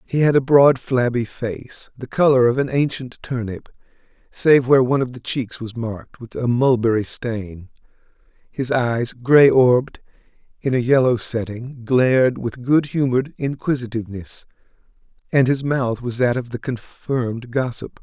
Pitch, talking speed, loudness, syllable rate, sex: 125 Hz, 155 wpm, -19 LUFS, 4.6 syllables/s, male